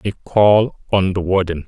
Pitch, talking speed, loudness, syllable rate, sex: 95 Hz, 180 wpm, -16 LUFS, 4.1 syllables/s, male